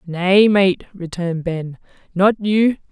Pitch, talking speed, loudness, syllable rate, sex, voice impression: 185 Hz, 125 wpm, -17 LUFS, 3.5 syllables/s, female, feminine, adult-like, tensed, powerful, slightly cool